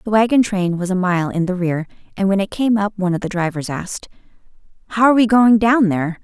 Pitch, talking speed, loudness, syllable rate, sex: 195 Hz, 240 wpm, -17 LUFS, 6.3 syllables/s, female